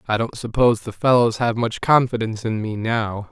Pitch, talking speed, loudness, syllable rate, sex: 115 Hz, 200 wpm, -20 LUFS, 5.4 syllables/s, male